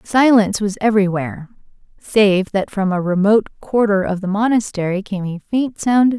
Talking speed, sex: 175 wpm, female